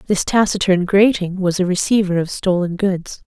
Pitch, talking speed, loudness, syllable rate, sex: 190 Hz, 165 wpm, -17 LUFS, 4.9 syllables/s, female